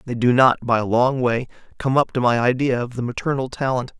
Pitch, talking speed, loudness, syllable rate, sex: 125 Hz, 240 wpm, -20 LUFS, 5.8 syllables/s, male